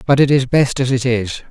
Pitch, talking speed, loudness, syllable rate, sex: 130 Hz, 280 wpm, -15 LUFS, 5.3 syllables/s, male